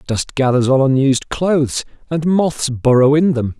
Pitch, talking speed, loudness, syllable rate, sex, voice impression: 140 Hz, 165 wpm, -15 LUFS, 4.7 syllables/s, male, very masculine, adult-like, slightly middle-aged, slightly thick, tensed, slightly powerful, bright, slightly hard, clear, fluent, cool, slightly intellectual, slightly refreshing, sincere, slightly calm, friendly, slightly reassuring, slightly unique, slightly wild, slightly lively, slightly strict, slightly intense